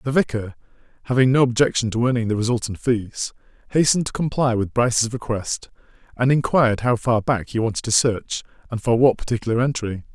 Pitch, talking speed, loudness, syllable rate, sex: 120 Hz, 175 wpm, -21 LUFS, 5.9 syllables/s, male